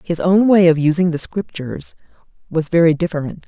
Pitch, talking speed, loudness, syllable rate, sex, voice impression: 170 Hz, 175 wpm, -16 LUFS, 5.7 syllables/s, female, very feminine, slightly middle-aged, slightly intellectual, slightly calm, elegant